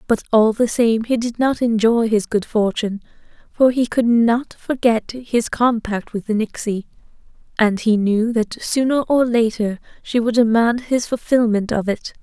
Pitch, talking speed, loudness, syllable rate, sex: 230 Hz, 170 wpm, -18 LUFS, 4.4 syllables/s, female